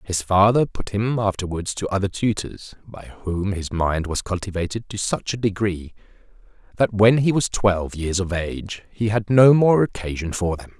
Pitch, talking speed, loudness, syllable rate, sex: 100 Hz, 185 wpm, -21 LUFS, 4.8 syllables/s, male